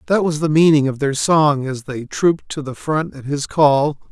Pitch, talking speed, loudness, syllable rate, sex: 145 Hz, 235 wpm, -17 LUFS, 4.7 syllables/s, male